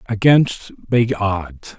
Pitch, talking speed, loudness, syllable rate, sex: 105 Hz, 100 wpm, -17 LUFS, 2.5 syllables/s, male